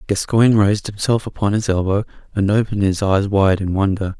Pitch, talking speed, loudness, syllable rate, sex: 100 Hz, 185 wpm, -18 LUFS, 5.9 syllables/s, male